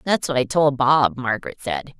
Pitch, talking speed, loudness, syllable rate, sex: 140 Hz, 210 wpm, -20 LUFS, 5.0 syllables/s, female